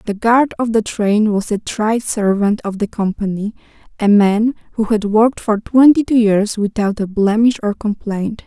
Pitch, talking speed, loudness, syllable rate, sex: 215 Hz, 175 wpm, -16 LUFS, 4.5 syllables/s, female